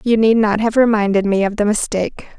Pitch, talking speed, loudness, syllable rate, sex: 215 Hz, 225 wpm, -16 LUFS, 5.9 syllables/s, female